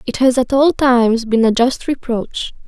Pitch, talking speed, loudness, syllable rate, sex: 245 Hz, 200 wpm, -15 LUFS, 4.5 syllables/s, female